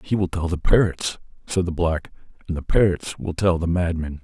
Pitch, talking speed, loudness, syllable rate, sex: 85 Hz, 210 wpm, -23 LUFS, 5.1 syllables/s, male